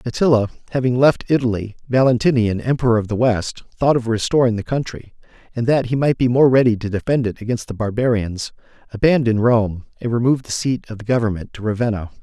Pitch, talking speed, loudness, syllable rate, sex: 115 Hz, 180 wpm, -18 LUFS, 6.0 syllables/s, male